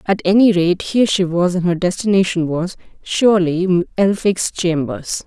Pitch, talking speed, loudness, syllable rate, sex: 185 Hz, 150 wpm, -16 LUFS, 4.6 syllables/s, female